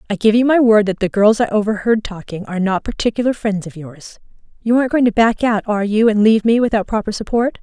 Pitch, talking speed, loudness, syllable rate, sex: 215 Hz, 245 wpm, -16 LUFS, 6.3 syllables/s, female